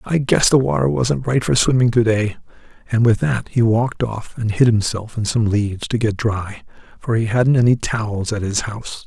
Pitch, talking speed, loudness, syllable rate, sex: 115 Hz, 220 wpm, -18 LUFS, 5.1 syllables/s, male